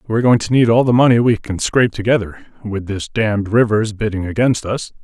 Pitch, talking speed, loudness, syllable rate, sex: 110 Hz, 215 wpm, -16 LUFS, 5.9 syllables/s, male